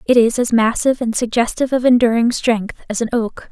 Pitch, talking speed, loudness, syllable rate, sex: 235 Hz, 205 wpm, -16 LUFS, 5.7 syllables/s, female